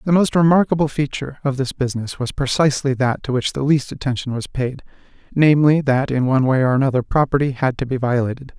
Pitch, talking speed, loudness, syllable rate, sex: 135 Hz, 205 wpm, -18 LUFS, 6.3 syllables/s, male